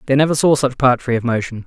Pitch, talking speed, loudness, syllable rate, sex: 130 Hz, 250 wpm, -16 LUFS, 6.6 syllables/s, male